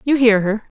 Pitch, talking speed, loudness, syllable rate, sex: 230 Hz, 225 wpm, -16 LUFS, 5.0 syllables/s, female